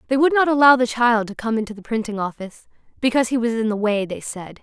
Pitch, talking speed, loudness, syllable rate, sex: 235 Hz, 260 wpm, -19 LUFS, 6.6 syllables/s, female